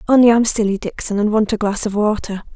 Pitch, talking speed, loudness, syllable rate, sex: 215 Hz, 235 wpm, -16 LUFS, 6.2 syllables/s, female